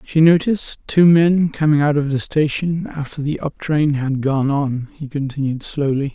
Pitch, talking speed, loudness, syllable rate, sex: 145 Hz, 175 wpm, -18 LUFS, 4.7 syllables/s, male